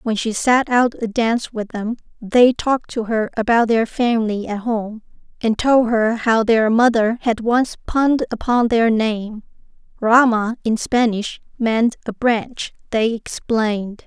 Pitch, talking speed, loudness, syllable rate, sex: 230 Hz, 160 wpm, -18 LUFS, 4.1 syllables/s, female